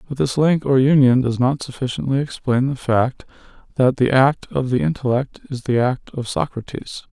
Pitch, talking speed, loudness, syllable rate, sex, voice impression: 130 Hz, 185 wpm, -19 LUFS, 5.0 syllables/s, male, very masculine, very adult-like, middle-aged, thick, slightly relaxed, very weak, dark, soft, muffled, slightly halting, slightly raspy, cool, intellectual, sincere, very calm, mature, friendly, slightly reassuring, elegant, slightly sweet, very kind, very modest